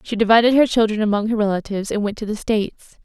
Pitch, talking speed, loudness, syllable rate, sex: 215 Hz, 235 wpm, -18 LUFS, 6.9 syllables/s, female